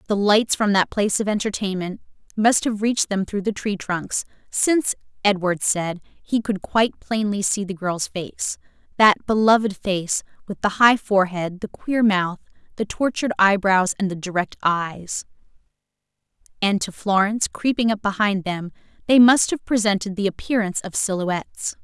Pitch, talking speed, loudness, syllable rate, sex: 200 Hz, 155 wpm, -21 LUFS, 4.8 syllables/s, female